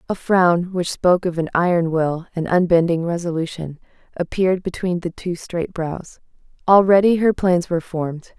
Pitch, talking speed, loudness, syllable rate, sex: 175 Hz, 155 wpm, -19 LUFS, 5.0 syllables/s, female